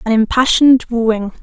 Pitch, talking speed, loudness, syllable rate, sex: 235 Hz, 125 wpm, -13 LUFS, 4.8 syllables/s, female